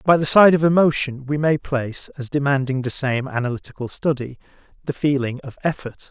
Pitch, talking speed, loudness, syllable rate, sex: 140 Hz, 175 wpm, -20 LUFS, 5.6 syllables/s, male